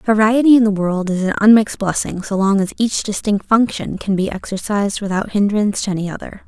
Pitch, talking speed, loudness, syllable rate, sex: 205 Hz, 205 wpm, -17 LUFS, 5.9 syllables/s, female